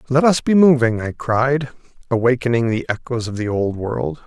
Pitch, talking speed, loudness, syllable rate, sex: 125 Hz, 185 wpm, -18 LUFS, 4.9 syllables/s, male